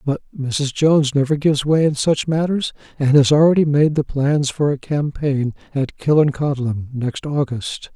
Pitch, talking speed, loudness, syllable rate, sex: 140 Hz, 165 wpm, -18 LUFS, 4.6 syllables/s, male